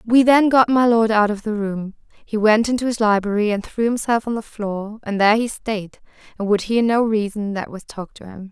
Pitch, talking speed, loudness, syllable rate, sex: 215 Hz, 240 wpm, -19 LUFS, 5.2 syllables/s, female